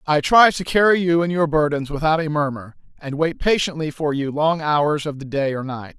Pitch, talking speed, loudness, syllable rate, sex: 155 Hz, 230 wpm, -19 LUFS, 5.1 syllables/s, male